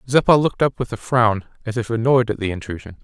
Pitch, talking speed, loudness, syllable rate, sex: 115 Hz, 235 wpm, -19 LUFS, 6.4 syllables/s, male